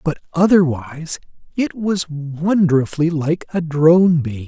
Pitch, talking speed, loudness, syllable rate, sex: 160 Hz, 120 wpm, -17 LUFS, 4.2 syllables/s, male